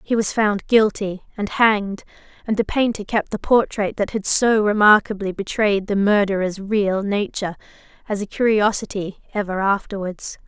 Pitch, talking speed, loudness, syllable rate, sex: 205 Hz, 150 wpm, -20 LUFS, 4.9 syllables/s, female